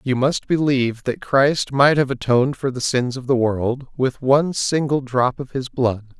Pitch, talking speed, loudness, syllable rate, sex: 130 Hz, 205 wpm, -19 LUFS, 4.5 syllables/s, male